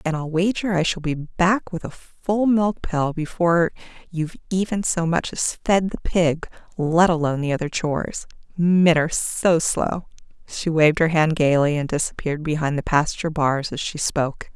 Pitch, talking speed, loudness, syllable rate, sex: 165 Hz, 175 wpm, -21 LUFS, 4.9 syllables/s, female